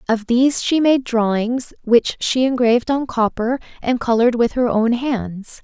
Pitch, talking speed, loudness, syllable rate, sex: 240 Hz, 170 wpm, -18 LUFS, 4.5 syllables/s, female